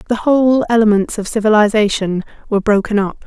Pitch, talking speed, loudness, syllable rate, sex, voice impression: 215 Hz, 145 wpm, -14 LUFS, 6.0 syllables/s, female, very feminine, slightly young, very thin, relaxed, slightly powerful, bright, slightly hard, clear, fluent, slightly raspy, very cute, intellectual, very refreshing, sincere, very calm, friendly, reassuring, very unique, very elegant, slightly wild, very sweet, slightly lively, kind, slightly intense, modest